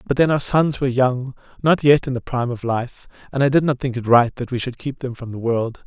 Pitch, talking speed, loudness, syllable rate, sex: 130 Hz, 265 wpm, -20 LUFS, 5.8 syllables/s, male